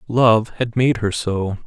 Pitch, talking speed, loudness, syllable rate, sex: 115 Hz, 180 wpm, -18 LUFS, 3.5 syllables/s, male